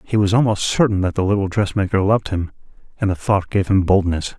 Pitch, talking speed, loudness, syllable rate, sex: 100 Hz, 220 wpm, -18 LUFS, 6.0 syllables/s, male